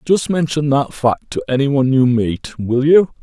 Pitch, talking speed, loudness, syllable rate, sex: 140 Hz, 205 wpm, -16 LUFS, 4.7 syllables/s, male